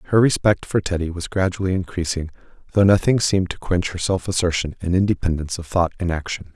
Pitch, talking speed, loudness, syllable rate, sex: 90 Hz, 190 wpm, -21 LUFS, 6.2 syllables/s, male